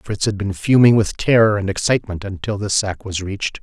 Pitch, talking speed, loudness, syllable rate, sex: 100 Hz, 215 wpm, -18 LUFS, 5.7 syllables/s, male